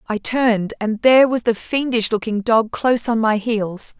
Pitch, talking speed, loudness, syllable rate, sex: 225 Hz, 195 wpm, -18 LUFS, 4.8 syllables/s, female